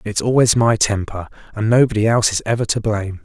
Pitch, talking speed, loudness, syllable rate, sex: 110 Hz, 205 wpm, -17 LUFS, 6.3 syllables/s, male